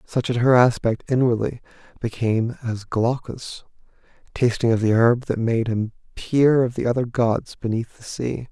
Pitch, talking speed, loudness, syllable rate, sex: 120 Hz, 160 wpm, -21 LUFS, 4.6 syllables/s, male